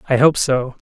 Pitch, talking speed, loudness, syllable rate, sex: 135 Hz, 205 wpm, -16 LUFS, 5.0 syllables/s, male